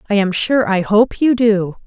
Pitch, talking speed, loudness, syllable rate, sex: 205 Hz, 225 wpm, -15 LUFS, 4.4 syllables/s, female